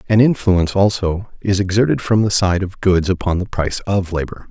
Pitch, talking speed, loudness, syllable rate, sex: 95 Hz, 200 wpm, -17 LUFS, 5.5 syllables/s, male